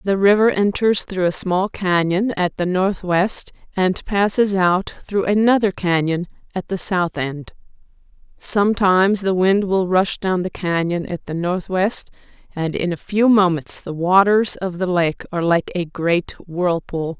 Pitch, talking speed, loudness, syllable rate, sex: 185 Hz, 160 wpm, -19 LUFS, 4.2 syllables/s, female